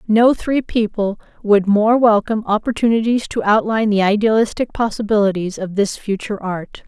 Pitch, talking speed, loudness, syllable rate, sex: 215 Hz, 140 wpm, -17 LUFS, 5.3 syllables/s, female